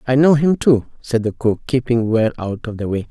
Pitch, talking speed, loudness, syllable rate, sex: 120 Hz, 250 wpm, -18 LUFS, 5.3 syllables/s, male